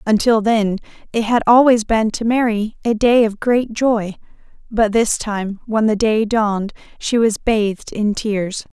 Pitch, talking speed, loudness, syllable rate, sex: 220 Hz, 170 wpm, -17 LUFS, 4.1 syllables/s, female